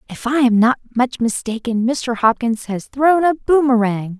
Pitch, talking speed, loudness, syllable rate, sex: 245 Hz, 155 wpm, -17 LUFS, 4.2 syllables/s, female